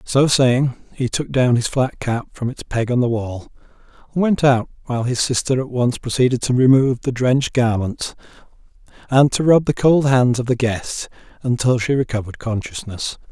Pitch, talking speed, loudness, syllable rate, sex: 125 Hz, 185 wpm, -18 LUFS, 5.1 syllables/s, male